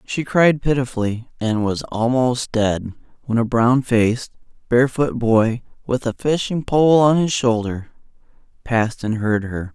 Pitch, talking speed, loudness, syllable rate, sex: 120 Hz, 150 wpm, -19 LUFS, 4.3 syllables/s, male